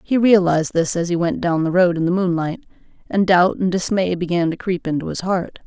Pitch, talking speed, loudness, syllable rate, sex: 175 Hz, 235 wpm, -18 LUFS, 5.6 syllables/s, female